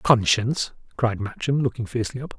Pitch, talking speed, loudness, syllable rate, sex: 120 Hz, 150 wpm, -24 LUFS, 5.7 syllables/s, male